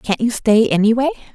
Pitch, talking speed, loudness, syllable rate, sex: 230 Hz, 180 wpm, -16 LUFS, 5.5 syllables/s, female